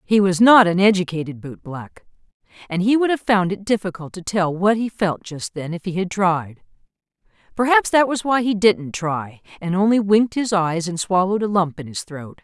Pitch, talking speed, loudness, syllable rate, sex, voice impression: 190 Hz, 210 wpm, -19 LUFS, 5.1 syllables/s, female, very feminine, very adult-like, middle-aged, slightly thin, tensed, slightly powerful, bright, slightly soft, very clear, fluent, cool, intellectual, very refreshing, sincere, very calm, reassuring, slightly elegant, wild, slightly sweet, lively, slightly kind, slightly intense